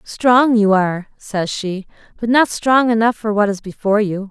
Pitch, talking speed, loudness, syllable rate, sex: 215 Hz, 195 wpm, -16 LUFS, 4.7 syllables/s, female